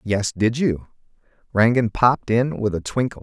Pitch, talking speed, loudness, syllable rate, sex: 110 Hz, 170 wpm, -20 LUFS, 4.9 syllables/s, male